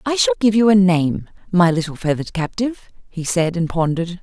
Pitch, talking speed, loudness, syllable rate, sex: 180 Hz, 200 wpm, -18 LUFS, 5.8 syllables/s, female